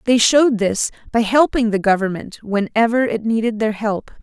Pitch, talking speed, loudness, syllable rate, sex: 220 Hz, 170 wpm, -17 LUFS, 5.0 syllables/s, female